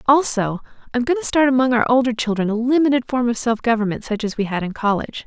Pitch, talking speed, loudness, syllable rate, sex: 240 Hz, 250 wpm, -19 LUFS, 6.8 syllables/s, female